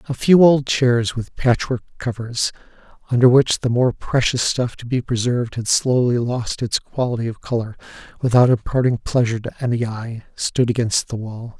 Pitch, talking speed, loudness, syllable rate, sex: 120 Hz, 175 wpm, -19 LUFS, 5.0 syllables/s, male